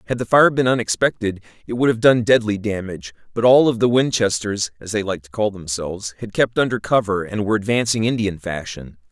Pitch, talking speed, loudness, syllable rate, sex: 105 Hz, 205 wpm, -19 LUFS, 6.0 syllables/s, male